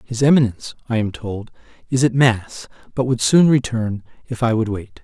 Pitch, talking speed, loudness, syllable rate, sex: 120 Hz, 190 wpm, -18 LUFS, 5.1 syllables/s, male